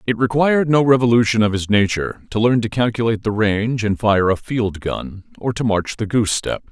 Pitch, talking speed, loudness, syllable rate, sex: 110 Hz, 215 wpm, -18 LUFS, 5.7 syllables/s, male